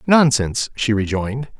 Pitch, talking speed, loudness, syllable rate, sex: 120 Hz, 115 wpm, -19 LUFS, 5.2 syllables/s, male